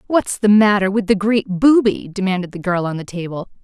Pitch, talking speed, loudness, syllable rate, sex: 200 Hz, 215 wpm, -17 LUFS, 5.4 syllables/s, female